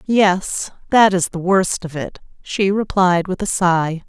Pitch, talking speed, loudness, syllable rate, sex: 185 Hz, 175 wpm, -17 LUFS, 3.7 syllables/s, female